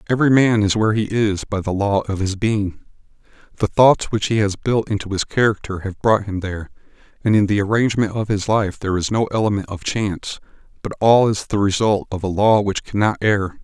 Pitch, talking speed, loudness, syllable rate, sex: 105 Hz, 215 wpm, -19 LUFS, 5.7 syllables/s, male